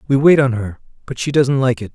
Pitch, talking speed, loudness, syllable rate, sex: 130 Hz, 275 wpm, -16 LUFS, 5.9 syllables/s, male